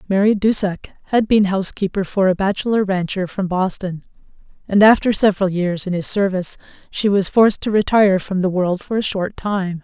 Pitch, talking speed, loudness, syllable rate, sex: 195 Hz, 185 wpm, -17 LUFS, 5.5 syllables/s, female